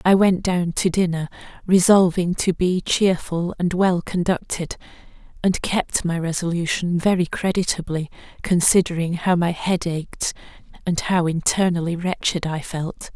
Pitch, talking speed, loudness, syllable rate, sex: 175 Hz, 130 wpm, -21 LUFS, 4.4 syllables/s, female